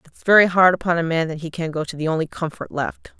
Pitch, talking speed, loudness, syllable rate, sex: 165 Hz, 280 wpm, -20 LUFS, 6.2 syllables/s, female